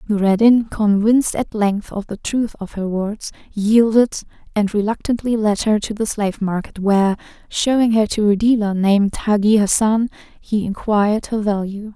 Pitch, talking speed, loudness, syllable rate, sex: 210 Hz, 160 wpm, -18 LUFS, 4.9 syllables/s, female